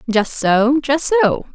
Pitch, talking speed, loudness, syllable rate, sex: 260 Hz, 155 wpm, -16 LUFS, 3.4 syllables/s, female